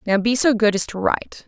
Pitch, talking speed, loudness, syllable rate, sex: 220 Hz, 285 wpm, -19 LUFS, 6.0 syllables/s, female